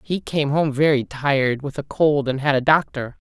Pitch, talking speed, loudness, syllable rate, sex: 140 Hz, 220 wpm, -20 LUFS, 4.8 syllables/s, female